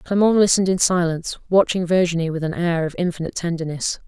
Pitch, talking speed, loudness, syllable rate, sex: 175 Hz, 175 wpm, -20 LUFS, 6.4 syllables/s, female